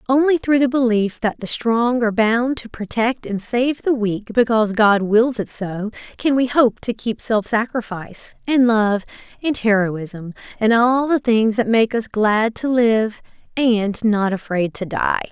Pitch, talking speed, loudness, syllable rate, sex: 225 Hz, 180 wpm, -18 LUFS, 4.2 syllables/s, female